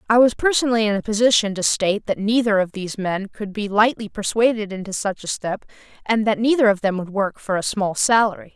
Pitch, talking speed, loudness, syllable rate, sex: 210 Hz, 225 wpm, -20 LUFS, 5.9 syllables/s, female